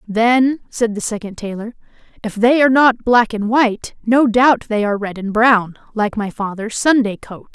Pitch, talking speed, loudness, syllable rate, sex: 225 Hz, 190 wpm, -16 LUFS, 4.8 syllables/s, female